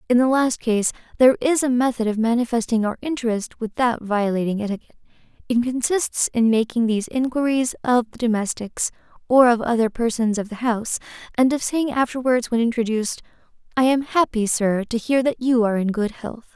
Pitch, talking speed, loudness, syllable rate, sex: 235 Hz, 180 wpm, -21 LUFS, 5.6 syllables/s, female